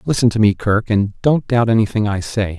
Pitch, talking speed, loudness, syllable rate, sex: 110 Hz, 210 wpm, -16 LUFS, 5.3 syllables/s, male